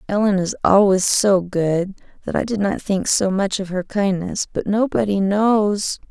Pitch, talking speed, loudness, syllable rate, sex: 195 Hz, 175 wpm, -19 LUFS, 4.3 syllables/s, female